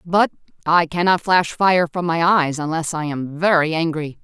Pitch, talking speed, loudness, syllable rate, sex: 165 Hz, 185 wpm, -18 LUFS, 4.5 syllables/s, female